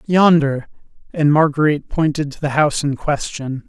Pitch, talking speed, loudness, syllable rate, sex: 150 Hz, 145 wpm, -17 LUFS, 5.1 syllables/s, male